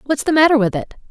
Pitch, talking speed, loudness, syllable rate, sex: 260 Hz, 270 wpm, -15 LUFS, 6.9 syllables/s, female